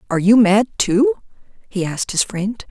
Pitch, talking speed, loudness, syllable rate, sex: 215 Hz, 175 wpm, -17 LUFS, 5.4 syllables/s, female